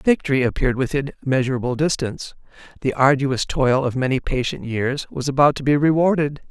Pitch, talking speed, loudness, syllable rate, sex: 135 Hz, 155 wpm, -20 LUFS, 5.7 syllables/s, male